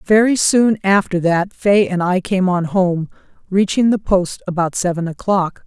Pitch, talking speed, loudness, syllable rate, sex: 190 Hz, 170 wpm, -16 LUFS, 4.3 syllables/s, female